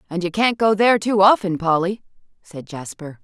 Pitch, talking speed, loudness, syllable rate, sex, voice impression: 190 Hz, 185 wpm, -17 LUFS, 5.3 syllables/s, female, very feminine, very adult-like, thin, tensed, slightly powerful, bright, slightly soft, very clear, very fluent, slightly raspy, cute, intellectual, very refreshing, sincere, calm, very friendly, very reassuring, elegant, wild, very sweet, very lively, strict, intense, sharp, light